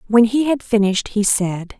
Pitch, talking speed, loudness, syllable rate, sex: 220 Hz, 200 wpm, -17 LUFS, 5.0 syllables/s, female